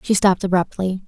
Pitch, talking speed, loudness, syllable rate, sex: 190 Hz, 170 wpm, -19 LUFS, 6.3 syllables/s, female